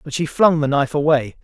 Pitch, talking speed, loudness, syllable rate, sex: 150 Hz, 250 wpm, -17 LUFS, 6.1 syllables/s, male